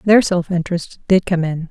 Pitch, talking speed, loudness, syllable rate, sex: 175 Hz, 210 wpm, -17 LUFS, 5.9 syllables/s, female